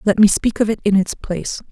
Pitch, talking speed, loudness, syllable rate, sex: 205 Hz, 280 wpm, -17 LUFS, 6.0 syllables/s, female